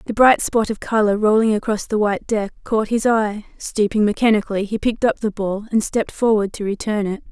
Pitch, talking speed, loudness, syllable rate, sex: 215 Hz, 215 wpm, -19 LUFS, 5.7 syllables/s, female